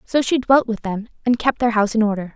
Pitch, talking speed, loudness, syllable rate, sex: 225 Hz, 280 wpm, -19 LUFS, 6.2 syllables/s, female